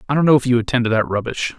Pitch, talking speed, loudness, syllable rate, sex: 125 Hz, 340 wpm, -17 LUFS, 7.8 syllables/s, male